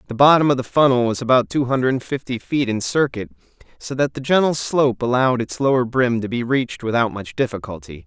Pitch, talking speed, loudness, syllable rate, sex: 125 Hz, 210 wpm, -19 LUFS, 6.0 syllables/s, male